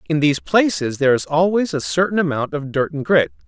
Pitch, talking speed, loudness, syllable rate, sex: 155 Hz, 225 wpm, -18 LUFS, 6.0 syllables/s, male